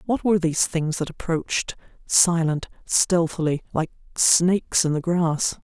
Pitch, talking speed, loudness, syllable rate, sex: 170 Hz, 125 wpm, -22 LUFS, 4.7 syllables/s, female